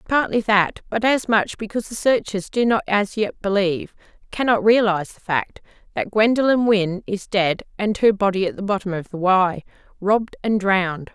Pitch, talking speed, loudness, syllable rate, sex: 205 Hz, 180 wpm, -20 LUFS, 5.4 syllables/s, female